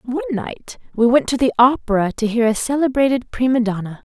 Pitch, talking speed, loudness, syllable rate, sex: 240 Hz, 190 wpm, -18 LUFS, 5.7 syllables/s, female